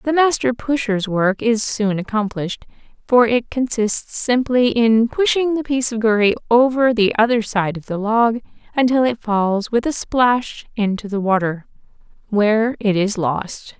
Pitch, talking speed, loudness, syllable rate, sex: 225 Hz, 160 wpm, -18 LUFS, 4.5 syllables/s, female